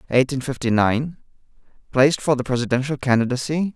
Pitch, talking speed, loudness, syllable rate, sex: 135 Hz, 110 wpm, -20 LUFS, 6.6 syllables/s, male